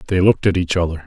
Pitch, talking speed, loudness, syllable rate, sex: 90 Hz, 280 wpm, -17 LUFS, 8.1 syllables/s, male